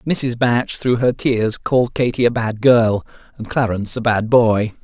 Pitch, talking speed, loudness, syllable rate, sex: 115 Hz, 185 wpm, -17 LUFS, 4.3 syllables/s, male